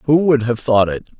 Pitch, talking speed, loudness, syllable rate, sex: 125 Hz, 250 wpm, -16 LUFS, 5.3 syllables/s, male